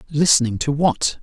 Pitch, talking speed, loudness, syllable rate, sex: 145 Hz, 145 wpm, -18 LUFS, 4.9 syllables/s, male